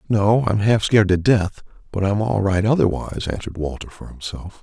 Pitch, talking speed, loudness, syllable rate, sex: 100 Hz, 195 wpm, -19 LUFS, 5.6 syllables/s, male